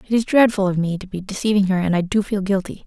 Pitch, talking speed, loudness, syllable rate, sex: 195 Hz, 295 wpm, -19 LUFS, 6.6 syllables/s, female